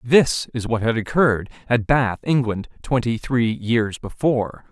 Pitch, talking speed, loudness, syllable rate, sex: 120 Hz, 155 wpm, -21 LUFS, 4.3 syllables/s, male